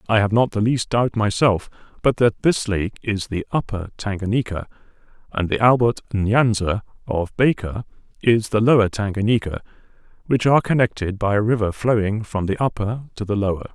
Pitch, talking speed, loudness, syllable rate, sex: 110 Hz, 165 wpm, -20 LUFS, 5.3 syllables/s, male